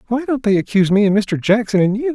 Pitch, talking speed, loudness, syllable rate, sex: 215 Hz, 280 wpm, -16 LUFS, 6.4 syllables/s, male